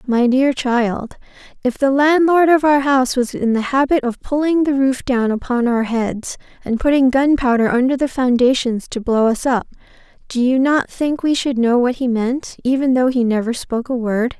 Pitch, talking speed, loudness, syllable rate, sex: 255 Hz, 200 wpm, -17 LUFS, 4.8 syllables/s, female